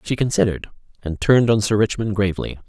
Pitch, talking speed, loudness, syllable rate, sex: 105 Hz, 180 wpm, -19 LUFS, 6.8 syllables/s, male